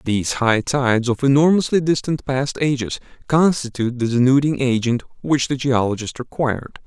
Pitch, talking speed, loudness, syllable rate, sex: 130 Hz, 140 wpm, -19 LUFS, 5.3 syllables/s, male